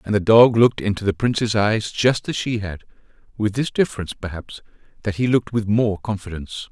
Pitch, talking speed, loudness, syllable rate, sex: 105 Hz, 190 wpm, -20 LUFS, 5.9 syllables/s, male